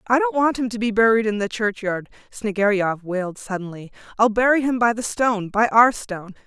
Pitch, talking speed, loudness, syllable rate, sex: 215 Hz, 205 wpm, -20 LUFS, 5.6 syllables/s, female